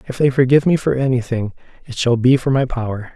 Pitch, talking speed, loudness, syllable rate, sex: 125 Hz, 230 wpm, -17 LUFS, 6.4 syllables/s, male